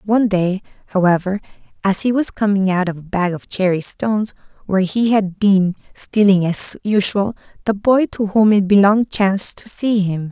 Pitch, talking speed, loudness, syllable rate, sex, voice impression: 200 Hz, 180 wpm, -17 LUFS, 5.0 syllables/s, female, feminine, adult-like, soft, fluent, raspy, slightly cute, calm, friendly, reassuring, elegant, kind, modest